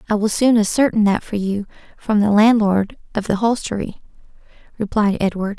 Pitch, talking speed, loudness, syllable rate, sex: 210 Hz, 160 wpm, -18 LUFS, 5.3 syllables/s, female